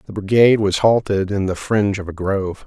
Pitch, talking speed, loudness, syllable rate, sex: 100 Hz, 225 wpm, -18 LUFS, 6.0 syllables/s, male